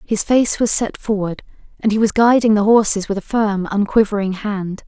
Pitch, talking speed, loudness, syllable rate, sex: 210 Hz, 195 wpm, -17 LUFS, 5.0 syllables/s, female